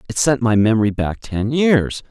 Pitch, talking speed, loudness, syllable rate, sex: 120 Hz, 200 wpm, -17 LUFS, 4.8 syllables/s, male